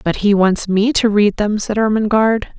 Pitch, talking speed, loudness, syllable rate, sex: 210 Hz, 210 wpm, -15 LUFS, 4.8 syllables/s, female